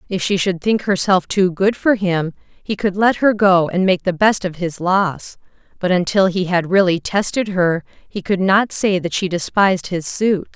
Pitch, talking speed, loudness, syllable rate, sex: 190 Hz, 210 wpm, -17 LUFS, 4.4 syllables/s, female